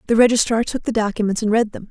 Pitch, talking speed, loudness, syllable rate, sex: 220 Hz, 250 wpm, -18 LUFS, 6.9 syllables/s, female